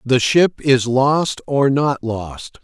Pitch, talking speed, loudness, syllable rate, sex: 135 Hz, 160 wpm, -17 LUFS, 2.9 syllables/s, male